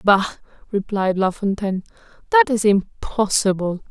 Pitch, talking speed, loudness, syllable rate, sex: 205 Hz, 110 wpm, -20 LUFS, 4.6 syllables/s, female